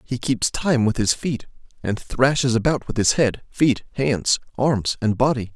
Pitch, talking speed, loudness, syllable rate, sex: 125 Hz, 185 wpm, -21 LUFS, 4.3 syllables/s, male